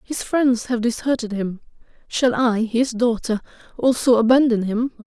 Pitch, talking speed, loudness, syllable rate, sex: 235 Hz, 140 wpm, -20 LUFS, 4.5 syllables/s, female